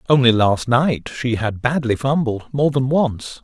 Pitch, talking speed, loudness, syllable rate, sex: 125 Hz, 175 wpm, -18 LUFS, 4.2 syllables/s, male